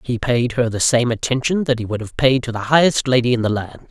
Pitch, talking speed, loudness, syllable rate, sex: 125 Hz, 275 wpm, -18 LUFS, 5.8 syllables/s, male